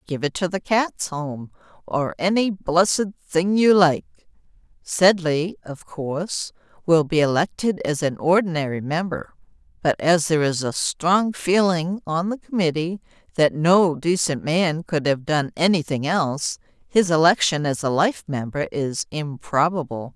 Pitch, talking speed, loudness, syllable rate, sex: 165 Hz, 145 wpm, -21 LUFS, 4.4 syllables/s, female